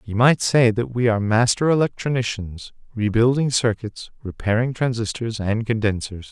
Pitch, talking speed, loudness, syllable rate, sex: 115 Hz, 135 wpm, -20 LUFS, 4.9 syllables/s, male